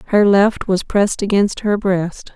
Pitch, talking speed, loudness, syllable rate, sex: 200 Hz, 180 wpm, -16 LUFS, 4.3 syllables/s, female